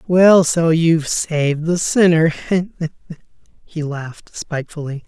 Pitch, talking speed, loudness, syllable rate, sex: 160 Hz, 105 wpm, -17 LUFS, 4.2 syllables/s, male